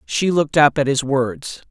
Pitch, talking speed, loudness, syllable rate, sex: 145 Hz, 210 wpm, -17 LUFS, 4.5 syllables/s, female